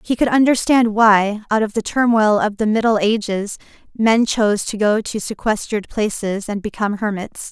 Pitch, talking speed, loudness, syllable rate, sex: 215 Hz, 175 wpm, -17 LUFS, 5.1 syllables/s, female